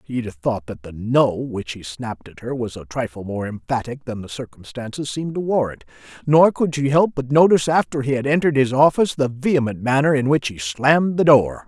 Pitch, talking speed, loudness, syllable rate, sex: 130 Hz, 215 wpm, -19 LUFS, 5.7 syllables/s, male